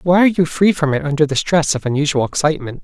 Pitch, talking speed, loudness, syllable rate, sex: 155 Hz, 255 wpm, -16 LUFS, 7.0 syllables/s, male